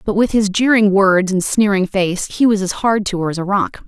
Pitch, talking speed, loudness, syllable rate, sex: 195 Hz, 265 wpm, -15 LUFS, 5.2 syllables/s, female